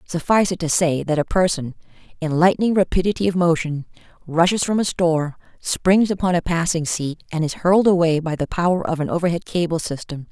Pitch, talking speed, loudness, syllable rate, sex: 170 Hz, 190 wpm, -20 LUFS, 5.8 syllables/s, female